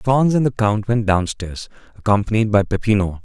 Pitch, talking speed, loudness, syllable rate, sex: 105 Hz, 165 wpm, -18 LUFS, 5.3 syllables/s, male